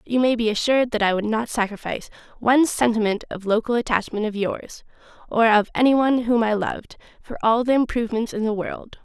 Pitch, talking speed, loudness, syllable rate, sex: 225 Hz, 205 wpm, -21 LUFS, 6.2 syllables/s, female